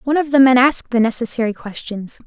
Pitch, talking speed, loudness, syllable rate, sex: 245 Hz, 210 wpm, -16 LUFS, 6.6 syllables/s, female